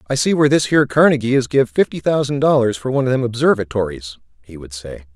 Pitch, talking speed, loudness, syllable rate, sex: 120 Hz, 220 wpm, -16 LUFS, 6.7 syllables/s, male